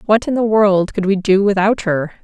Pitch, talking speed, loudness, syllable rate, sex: 200 Hz, 240 wpm, -15 LUFS, 5.0 syllables/s, female